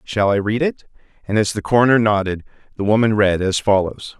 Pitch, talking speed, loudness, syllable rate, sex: 105 Hz, 200 wpm, -17 LUFS, 5.6 syllables/s, male